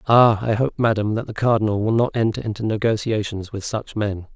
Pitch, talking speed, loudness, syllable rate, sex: 110 Hz, 195 wpm, -21 LUFS, 5.6 syllables/s, male